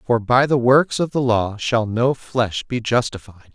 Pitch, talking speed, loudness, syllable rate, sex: 120 Hz, 205 wpm, -19 LUFS, 4.1 syllables/s, male